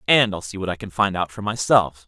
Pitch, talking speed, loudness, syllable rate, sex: 100 Hz, 290 wpm, -21 LUFS, 5.8 syllables/s, male